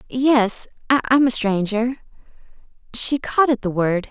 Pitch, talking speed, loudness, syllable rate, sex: 235 Hz, 130 wpm, -19 LUFS, 3.7 syllables/s, female